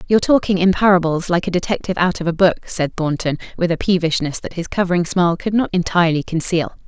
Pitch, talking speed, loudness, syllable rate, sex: 175 Hz, 210 wpm, -18 LUFS, 6.6 syllables/s, female